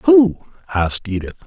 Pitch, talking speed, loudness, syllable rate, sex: 145 Hz, 125 wpm, -18 LUFS, 5.1 syllables/s, male